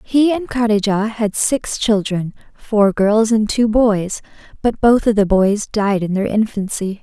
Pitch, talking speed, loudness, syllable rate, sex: 215 Hz, 170 wpm, -16 LUFS, 4.0 syllables/s, female